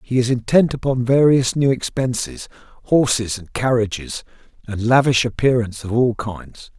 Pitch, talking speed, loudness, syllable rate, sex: 120 Hz, 135 wpm, -18 LUFS, 4.8 syllables/s, male